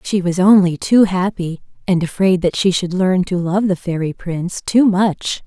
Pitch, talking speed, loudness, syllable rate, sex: 185 Hz, 200 wpm, -16 LUFS, 4.5 syllables/s, female